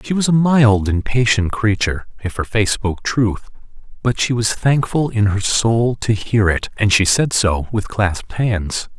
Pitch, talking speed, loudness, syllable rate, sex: 110 Hz, 195 wpm, -17 LUFS, 4.4 syllables/s, male